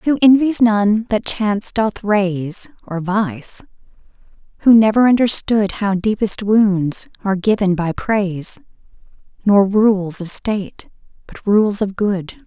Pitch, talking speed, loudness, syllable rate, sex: 205 Hz, 130 wpm, -16 LUFS, 3.9 syllables/s, female